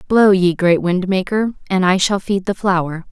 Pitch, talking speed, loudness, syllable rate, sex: 190 Hz, 210 wpm, -16 LUFS, 4.8 syllables/s, female